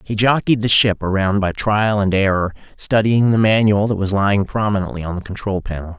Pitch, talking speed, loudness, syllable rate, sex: 100 Hz, 200 wpm, -17 LUFS, 5.5 syllables/s, male